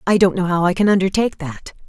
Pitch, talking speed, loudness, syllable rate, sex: 185 Hz, 255 wpm, -17 LUFS, 6.7 syllables/s, female